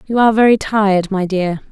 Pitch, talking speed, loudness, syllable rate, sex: 205 Hz, 210 wpm, -14 LUFS, 5.9 syllables/s, female